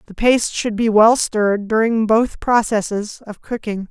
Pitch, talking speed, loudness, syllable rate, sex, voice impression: 220 Hz, 170 wpm, -17 LUFS, 4.6 syllables/s, female, very feminine, very middle-aged, slightly thin, slightly relaxed, slightly weak, slightly dark, very hard, clear, fluent, slightly raspy, slightly cool, slightly intellectual, slightly refreshing, sincere, very calm, slightly friendly, slightly reassuring, very unique, slightly elegant, wild, slightly sweet, slightly lively, kind, slightly sharp, modest